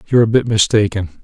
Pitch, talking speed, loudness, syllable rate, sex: 110 Hz, 195 wpm, -14 LUFS, 7.1 syllables/s, male